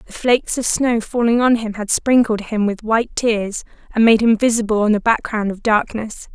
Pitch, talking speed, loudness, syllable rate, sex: 220 Hz, 210 wpm, -17 LUFS, 5.1 syllables/s, female